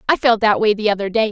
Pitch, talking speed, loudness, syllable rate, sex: 215 Hz, 320 wpm, -16 LUFS, 7.0 syllables/s, female